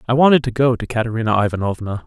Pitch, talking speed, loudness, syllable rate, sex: 115 Hz, 205 wpm, -18 LUFS, 7.3 syllables/s, male